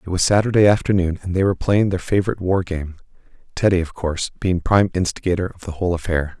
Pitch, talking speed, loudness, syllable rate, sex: 90 Hz, 205 wpm, -19 LUFS, 6.9 syllables/s, male